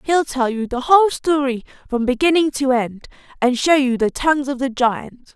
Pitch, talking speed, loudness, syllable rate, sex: 270 Hz, 200 wpm, -18 LUFS, 4.9 syllables/s, female